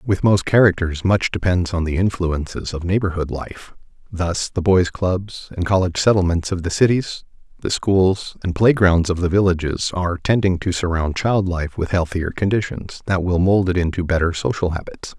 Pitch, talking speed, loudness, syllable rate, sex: 90 Hz, 180 wpm, -19 LUFS, 5.0 syllables/s, male